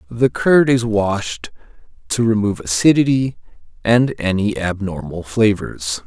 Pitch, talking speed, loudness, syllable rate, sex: 105 Hz, 110 wpm, -17 LUFS, 4.1 syllables/s, male